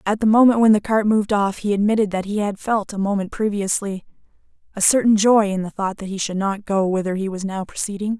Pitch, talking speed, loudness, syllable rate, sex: 205 Hz, 240 wpm, -19 LUFS, 6.0 syllables/s, female